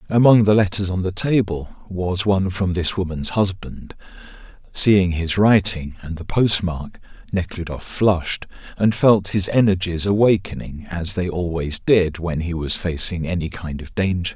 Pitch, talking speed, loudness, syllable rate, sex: 90 Hz, 155 wpm, -20 LUFS, 4.5 syllables/s, male